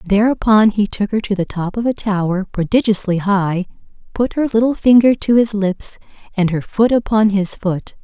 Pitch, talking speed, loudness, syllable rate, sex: 205 Hz, 185 wpm, -16 LUFS, 4.9 syllables/s, female